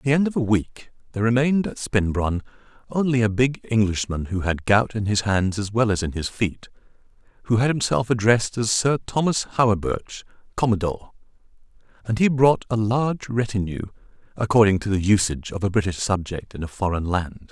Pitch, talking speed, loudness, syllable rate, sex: 110 Hz, 180 wpm, -22 LUFS, 5.6 syllables/s, male